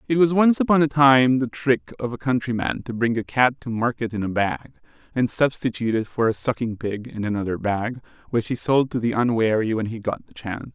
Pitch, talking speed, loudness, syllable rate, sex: 120 Hz, 230 wpm, -22 LUFS, 5.6 syllables/s, male